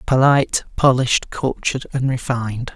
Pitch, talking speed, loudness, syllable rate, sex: 130 Hz, 110 wpm, -19 LUFS, 5.2 syllables/s, male